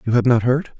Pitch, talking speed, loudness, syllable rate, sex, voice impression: 125 Hz, 300 wpm, -17 LUFS, 6.1 syllables/s, male, very masculine, very adult-like, middle-aged, very thick, tensed, powerful, bright, slightly soft, clear, very cool, intellectual, sincere, very calm, very mature, friendly, reassuring, very unique, elegant, wild, sweet, slightly lively, kind